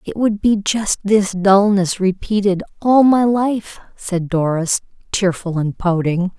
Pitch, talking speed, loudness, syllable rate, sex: 195 Hz, 140 wpm, -17 LUFS, 3.8 syllables/s, female